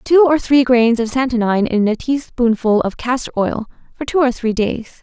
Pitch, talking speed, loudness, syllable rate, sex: 240 Hz, 205 wpm, -16 LUFS, 5.0 syllables/s, female